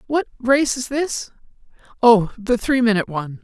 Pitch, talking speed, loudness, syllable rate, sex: 235 Hz, 140 wpm, -19 LUFS, 4.9 syllables/s, female